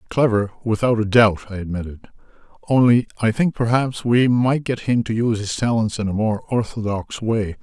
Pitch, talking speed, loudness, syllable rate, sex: 115 Hz, 180 wpm, -19 LUFS, 5.2 syllables/s, male